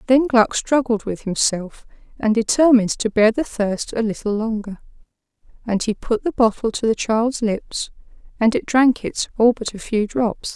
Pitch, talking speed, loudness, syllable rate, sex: 230 Hz, 180 wpm, -19 LUFS, 4.6 syllables/s, female